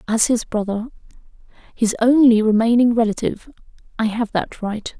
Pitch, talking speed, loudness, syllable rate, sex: 225 Hz, 120 wpm, -18 LUFS, 5.3 syllables/s, female